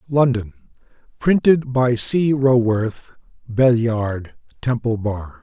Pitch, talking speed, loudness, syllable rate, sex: 120 Hz, 100 wpm, -19 LUFS, 3.5 syllables/s, male